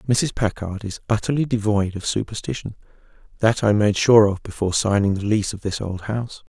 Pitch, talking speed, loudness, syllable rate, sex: 105 Hz, 185 wpm, -21 LUFS, 5.8 syllables/s, male